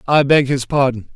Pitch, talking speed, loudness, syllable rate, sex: 135 Hz, 210 wpm, -15 LUFS, 5.2 syllables/s, male